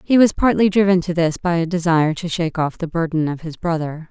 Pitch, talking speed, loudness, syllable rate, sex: 170 Hz, 250 wpm, -18 LUFS, 6.1 syllables/s, female